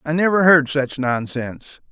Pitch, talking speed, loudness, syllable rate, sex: 145 Hz, 155 wpm, -18 LUFS, 4.7 syllables/s, male